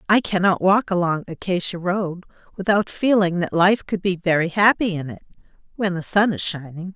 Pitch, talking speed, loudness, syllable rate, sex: 185 Hz, 170 wpm, -20 LUFS, 5.1 syllables/s, female